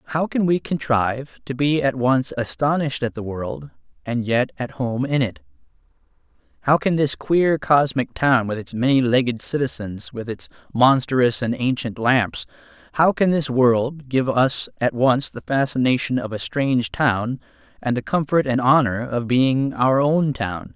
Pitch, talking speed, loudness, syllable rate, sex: 130 Hz, 170 wpm, -20 LUFS, 4.4 syllables/s, male